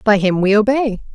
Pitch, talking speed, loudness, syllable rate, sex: 215 Hz, 210 wpm, -15 LUFS, 5.2 syllables/s, female